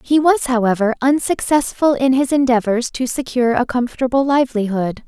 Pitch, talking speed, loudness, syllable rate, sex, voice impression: 250 Hz, 140 wpm, -17 LUFS, 5.5 syllables/s, female, feminine, adult-like, tensed, bright, clear, fluent, cute, calm, friendly, reassuring, elegant, slightly sweet, lively, kind